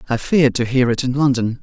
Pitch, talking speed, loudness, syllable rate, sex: 125 Hz, 260 wpm, -17 LUFS, 6.3 syllables/s, male